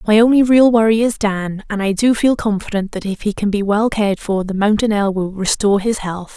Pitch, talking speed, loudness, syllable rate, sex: 210 Hz, 245 wpm, -16 LUFS, 5.5 syllables/s, female